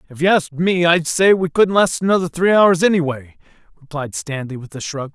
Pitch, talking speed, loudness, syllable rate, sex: 165 Hz, 210 wpm, -17 LUFS, 5.5 syllables/s, male